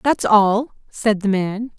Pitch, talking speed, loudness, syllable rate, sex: 215 Hz, 170 wpm, -18 LUFS, 3.4 syllables/s, female